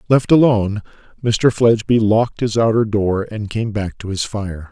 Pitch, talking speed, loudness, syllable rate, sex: 110 Hz, 180 wpm, -17 LUFS, 4.9 syllables/s, male